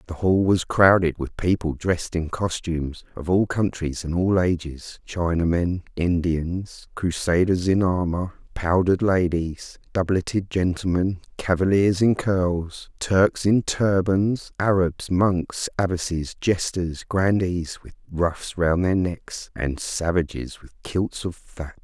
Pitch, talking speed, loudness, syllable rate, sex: 90 Hz, 125 wpm, -23 LUFS, 3.8 syllables/s, male